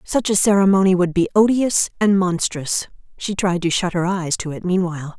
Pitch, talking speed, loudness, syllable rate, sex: 185 Hz, 195 wpm, -18 LUFS, 5.2 syllables/s, female